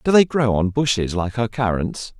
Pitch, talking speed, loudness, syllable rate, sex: 115 Hz, 220 wpm, -20 LUFS, 4.8 syllables/s, male